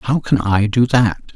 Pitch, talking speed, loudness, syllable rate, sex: 115 Hz, 220 wpm, -16 LUFS, 4.1 syllables/s, male